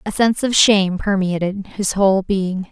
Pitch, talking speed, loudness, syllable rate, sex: 195 Hz, 175 wpm, -17 LUFS, 5.2 syllables/s, female